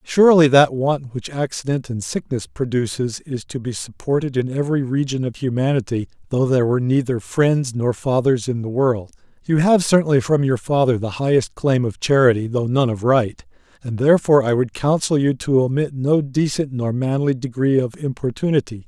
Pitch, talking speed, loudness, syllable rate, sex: 130 Hz, 180 wpm, -19 LUFS, 5.3 syllables/s, male